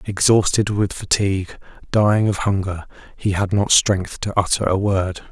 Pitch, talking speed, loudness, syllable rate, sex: 100 Hz, 160 wpm, -19 LUFS, 4.6 syllables/s, male